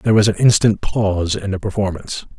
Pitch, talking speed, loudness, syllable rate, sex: 100 Hz, 200 wpm, -17 LUFS, 6.3 syllables/s, male